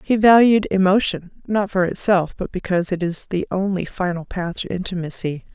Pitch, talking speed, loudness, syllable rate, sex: 185 Hz, 160 wpm, -20 LUFS, 5.1 syllables/s, female